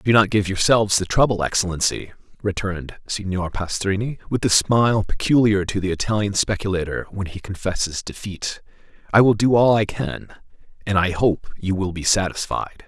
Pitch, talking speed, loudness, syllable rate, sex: 100 Hz, 165 wpm, -21 LUFS, 5.2 syllables/s, male